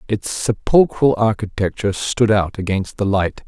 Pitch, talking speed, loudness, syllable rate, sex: 105 Hz, 140 wpm, -18 LUFS, 4.6 syllables/s, male